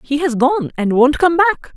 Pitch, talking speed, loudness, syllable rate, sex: 290 Hz, 240 wpm, -15 LUFS, 5.2 syllables/s, female